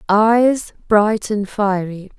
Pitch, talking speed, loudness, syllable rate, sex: 210 Hz, 80 wpm, -17 LUFS, 2.8 syllables/s, female